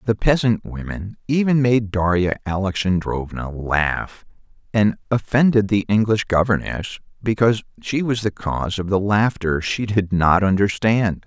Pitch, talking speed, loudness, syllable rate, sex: 100 Hz, 135 wpm, -20 LUFS, 4.5 syllables/s, male